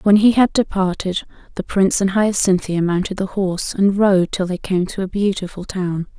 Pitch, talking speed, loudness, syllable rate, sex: 190 Hz, 195 wpm, -18 LUFS, 5.1 syllables/s, female